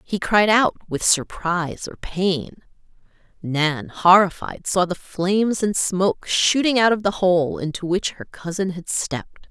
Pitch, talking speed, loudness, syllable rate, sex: 185 Hz, 160 wpm, -20 LUFS, 4.1 syllables/s, female